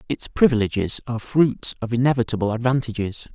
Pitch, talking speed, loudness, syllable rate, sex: 120 Hz, 125 wpm, -21 LUFS, 6.0 syllables/s, male